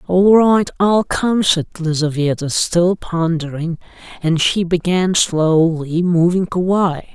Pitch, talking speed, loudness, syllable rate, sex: 175 Hz, 120 wpm, -16 LUFS, 3.6 syllables/s, male